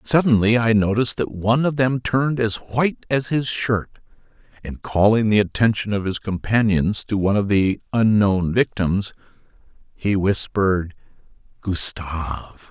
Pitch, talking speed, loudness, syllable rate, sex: 105 Hz, 135 wpm, -20 LUFS, 4.8 syllables/s, male